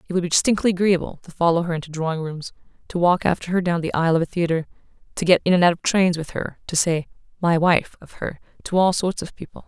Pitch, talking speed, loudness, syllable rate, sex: 170 Hz, 255 wpm, -21 LUFS, 6.5 syllables/s, female